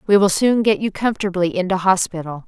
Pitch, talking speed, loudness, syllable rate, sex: 190 Hz, 195 wpm, -18 LUFS, 6.0 syllables/s, female